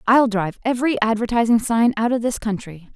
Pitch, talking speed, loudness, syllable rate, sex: 225 Hz, 185 wpm, -19 LUFS, 5.9 syllables/s, female